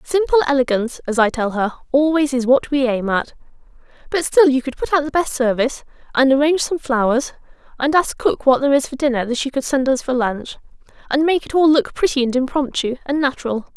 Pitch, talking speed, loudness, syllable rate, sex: 275 Hz, 220 wpm, -18 LUFS, 6.0 syllables/s, female